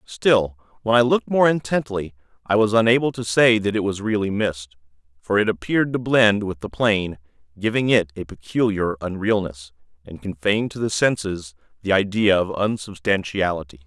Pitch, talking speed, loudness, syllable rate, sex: 100 Hz, 165 wpm, -20 LUFS, 5.1 syllables/s, male